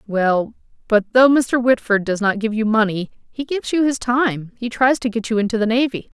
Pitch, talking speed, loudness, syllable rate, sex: 230 Hz, 225 wpm, -18 LUFS, 5.3 syllables/s, female